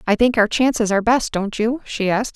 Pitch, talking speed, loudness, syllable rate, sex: 225 Hz, 255 wpm, -18 LUFS, 6.0 syllables/s, female